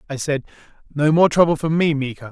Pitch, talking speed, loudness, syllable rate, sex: 150 Hz, 205 wpm, -18 LUFS, 6.0 syllables/s, male